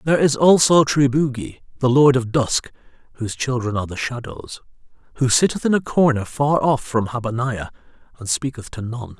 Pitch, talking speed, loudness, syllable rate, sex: 130 Hz, 170 wpm, -19 LUFS, 5.4 syllables/s, male